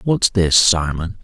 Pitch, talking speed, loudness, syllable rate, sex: 90 Hz, 145 wpm, -15 LUFS, 3.6 syllables/s, male